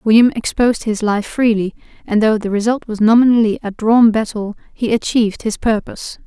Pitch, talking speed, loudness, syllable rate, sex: 220 Hz, 170 wpm, -15 LUFS, 5.6 syllables/s, female